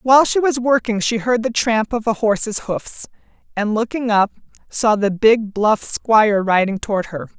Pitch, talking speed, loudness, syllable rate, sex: 220 Hz, 185 wpm, -17 LUFS, 4.7 syllables/s, female